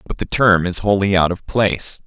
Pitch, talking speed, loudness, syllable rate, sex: 95 Hz, 230 wpm, -17 LUFS, 5.2 syllables/s, male